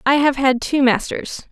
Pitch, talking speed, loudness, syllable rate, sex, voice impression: 265 Hz, 195 wpm, -17 LUFS, 4.4 syllables/s, female, feminine, adult-like, tensed, slightly powerful, bright, soft, raspy, intellectual, friendly, reassuring, elegant, lively, kind